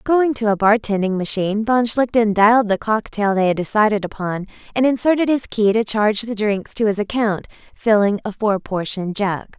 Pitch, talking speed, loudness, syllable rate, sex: 215 Hz, 190 wpm, -18 LUFS, 5.3 syllables/s, female